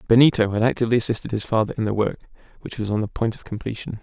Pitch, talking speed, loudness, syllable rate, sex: 110 Hz, 240 wpm, -22 LUFS, 7.4 syllables/s, male